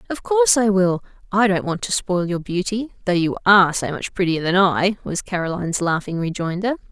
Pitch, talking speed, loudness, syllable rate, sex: 190 Hz, 200 wpm, -20 LUFS, 5.5 syllables/s, female